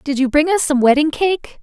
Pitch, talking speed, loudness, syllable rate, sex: 300 Hz, 260 wpm, -15 LUFS, 5.2 syllables/s, female